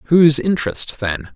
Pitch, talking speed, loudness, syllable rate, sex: 140 Hz, 130 wpm, -17 LUFS, 4.6 syllables/s, male